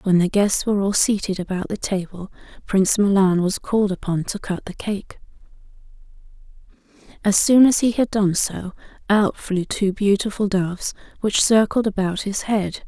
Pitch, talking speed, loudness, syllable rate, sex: 200 Hz, 165 wpm, -20 LUFS, 4.9 syllables/s, female